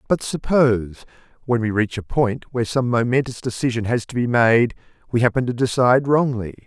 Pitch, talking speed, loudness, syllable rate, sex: 120 Hz, 180 wpm, -20 LUFS, 5.4 syllables/s, male